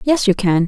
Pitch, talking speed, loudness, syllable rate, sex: 210 Hz, 265 wpm, -16 LUFS, 5.3 syllables/s, female